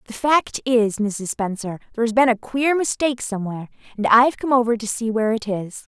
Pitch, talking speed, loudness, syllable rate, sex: 230 Hz, 200 wpm, -20 LUFS, 5.8 syllables/s, female